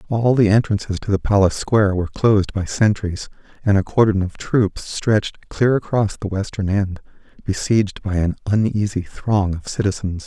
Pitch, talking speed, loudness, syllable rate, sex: 100 Hz, 170 wpm, -19 LUFS, 5.2 syllables/s, male